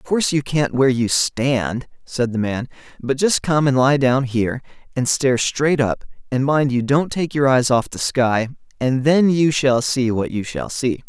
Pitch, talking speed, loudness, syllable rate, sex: 130 Hz, 215 wpm, -18 LUFS, 4.5 syllables/s, male